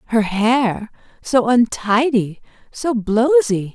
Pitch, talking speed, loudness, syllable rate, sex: 230 Hz, 95 wpm, -17 LUFS, 3.1 syllables/s, female